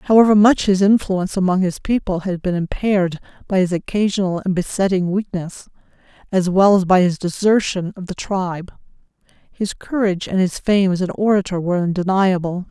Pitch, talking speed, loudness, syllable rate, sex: 190 Hz, 165 wpm, -18 LUFS, 5.5 syllables/s, female